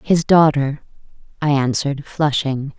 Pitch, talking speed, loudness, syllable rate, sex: 145 Hz, 110 wpm, -18 LUFS, 4.3 syllables/s, female